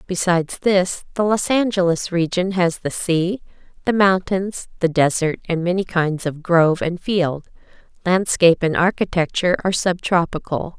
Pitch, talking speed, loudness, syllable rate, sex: 180 Hz, 145 wpm, -19 LUFS, 4.8 syllables/s, female